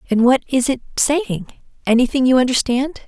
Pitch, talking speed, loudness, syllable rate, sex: 260 Hz, 135 wpm, -17 LUFS, 5.0 syllables/s, female